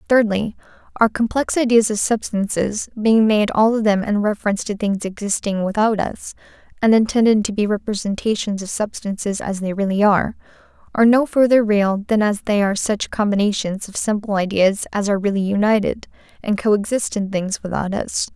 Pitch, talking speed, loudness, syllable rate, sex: 210 Hz, 175 wpm, -19 LUFS, 5.4 syllables/s, female